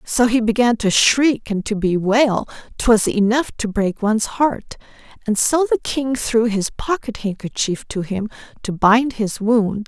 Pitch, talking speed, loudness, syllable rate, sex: 225 Hz, 170 wpm, -18 LUFS, 4.1 syllables/s, female